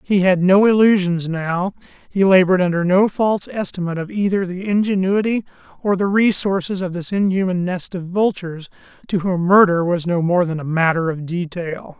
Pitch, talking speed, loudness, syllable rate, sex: 185 Hz, 175 wpm, -18 LUFS, 5.3 syllables/s, male